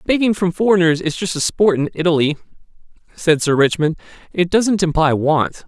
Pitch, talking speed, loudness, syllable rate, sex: 170 Hz, 150 wpm, -17 LUFS, 5.3 syllables/s, male